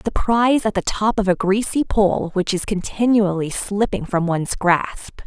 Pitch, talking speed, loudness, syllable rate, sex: 200 Hz, 180 wpm, -19 LUFS, 4.5 syllables/s, female